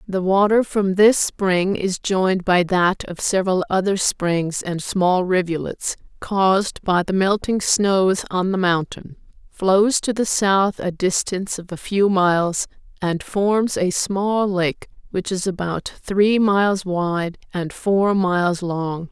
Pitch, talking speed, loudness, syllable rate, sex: 190 Hz, 155 wpm, -20 LUFS, 3.7 syllables/s, female